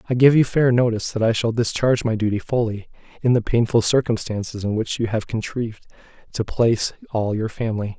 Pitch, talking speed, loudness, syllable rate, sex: 115 Hz, 195 wpm, -21 LUFS, 6.0 syllables/s, male